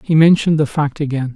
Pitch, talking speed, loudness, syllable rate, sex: 150 Hz, 220 wpm, -15 LUFS, 6.4 syllables/s, male